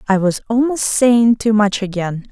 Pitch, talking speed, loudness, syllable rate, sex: 215 Hz, 180 wpm, -15 LUFS, 4.4 syllables/s, female